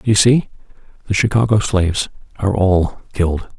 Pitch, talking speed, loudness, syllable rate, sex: 100 Hz, 135 wpm, -17 LUFS, 5.4 syllables/s, male